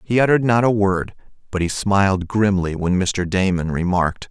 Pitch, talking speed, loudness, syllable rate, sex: 100 Hz, 180 wpm, -19 LUFS, 5.2 syllables/s, male